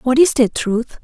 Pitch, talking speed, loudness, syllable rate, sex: 255 Hz, 230 wpm, -16 LUFS, 4.0 syllables/s, female